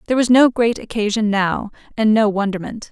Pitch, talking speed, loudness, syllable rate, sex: 220 Hz, 185 wpm, -17 LUFS, 5.7 syllables/s, female